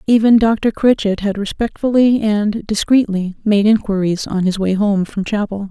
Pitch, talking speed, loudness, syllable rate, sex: 210 Hz, 160 wpm, -16 LUFS, 4.6 syllables/s, female